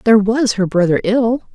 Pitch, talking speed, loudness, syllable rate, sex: 215 Hz, 195 wpm, -15 LUFS, 5.1 syllables/s, female